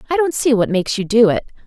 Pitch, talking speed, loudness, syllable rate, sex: 235 Hz, 290 wpm, -16 LUFS, 7.3 syllables/s, female